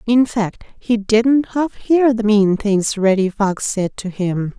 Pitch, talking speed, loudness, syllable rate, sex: 215 Hz, 185 wpm, -17 LUFS, 3.6 syllables/s, female